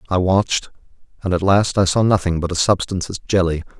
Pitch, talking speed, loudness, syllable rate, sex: 90 Hz, 205 wpm, -18 LUFS, 6.1 syllables/s, male